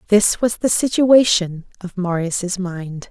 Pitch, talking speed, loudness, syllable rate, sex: 195 Hz, 135 wpm, -17 LUFS, 3.6 syllables/s, female